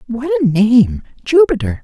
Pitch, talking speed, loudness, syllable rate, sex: 220 Hz, 100 wpm, -13 LUFS, 4.1 syllables/s, male